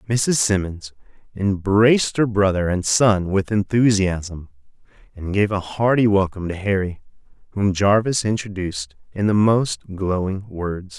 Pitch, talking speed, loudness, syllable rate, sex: 100 Hz, 130 wpm, -20 LUFS, 4.3 syllables/s, male